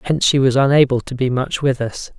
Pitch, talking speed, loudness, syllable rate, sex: 130 Hz, 245 wpm, -17 LUFS, 5.8 syllables/s, male